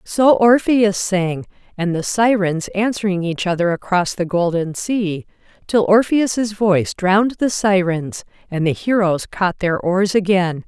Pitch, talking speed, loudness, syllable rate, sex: 195 Hz, 145 wpm, -17 LUFS, 4.1 syllables/s, female